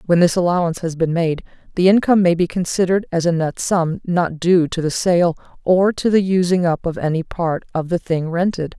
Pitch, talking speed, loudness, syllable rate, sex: 175 Hz, 220 wpm, -18 LUFS, 5.5 syllables/s, female